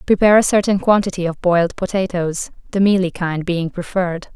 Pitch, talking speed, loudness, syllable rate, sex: 185 Hz, 165 wpm, -17 LUFS, 5.8 syllables/s, female